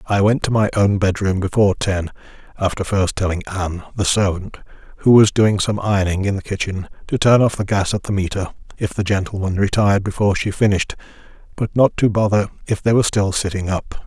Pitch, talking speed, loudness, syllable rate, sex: 100 Hz, 200 wpm, -18 LUFS, 6.0 syllables/s, male